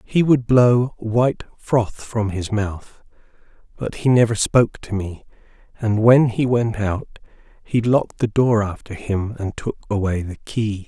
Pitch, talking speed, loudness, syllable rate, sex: 110 Hz, 165 wpm, -20 LUFS, 4.1 syllables/s, male